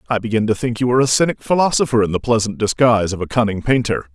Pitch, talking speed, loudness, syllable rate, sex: 115 Hz, 245 wpm, -17 LUFS, 7.2 syllables/s, male